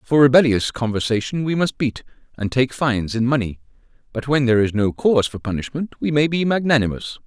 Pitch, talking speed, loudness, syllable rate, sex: 125 Hz, 190 wpm, -19 LUFS, 5.9 syllables/s, male